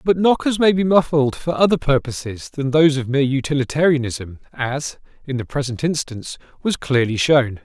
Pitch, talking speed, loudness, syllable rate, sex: 140 Hz, 165 wpm, -19 LUFS, 5.4 syllables/s, male